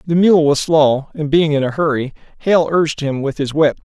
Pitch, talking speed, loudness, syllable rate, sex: 150 Hz, 230 wpm, -15 LUFS, 5.0 syllables/s, male